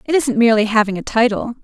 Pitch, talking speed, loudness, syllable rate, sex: 230 Hz, 220 wpm, -16 LUFS, 6.7 syllables/s, female